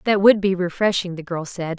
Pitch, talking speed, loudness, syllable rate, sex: 185 Hz, 235 wpm, -20 LUFS, 5.2 syllables/s, female